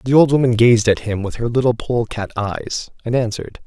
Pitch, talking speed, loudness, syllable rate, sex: 115 Hz, 215 wpm, -18 LUFS, 5.8 syllables/s, male